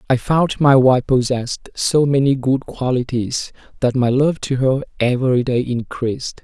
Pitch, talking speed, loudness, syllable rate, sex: 130 Hz, 160 wpm, -17 LUFS, 4.6 syllables/s, male